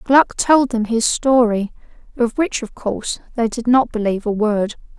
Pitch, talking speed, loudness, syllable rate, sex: 235 Hz, 180 wpm, -18 LUFS, 4.6 syllables/s, female